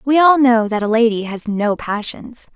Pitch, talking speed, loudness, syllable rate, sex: 230 Hz, 210 wpm, -16 LUFS, 4.6 syllables/s, female